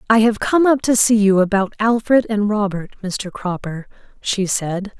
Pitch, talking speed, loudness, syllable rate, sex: 210 Hz, 180 wpm, -17 LUFS, 4.4 syllables/s, female